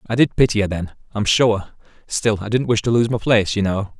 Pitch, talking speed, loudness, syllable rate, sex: 110 Hz, 255 wpm, -19 LUFS, 5.8 syllables/s, male